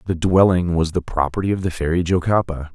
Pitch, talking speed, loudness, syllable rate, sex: 90 Hz, 195 wpm, -19 LUFS, 5.9 syllables/s, male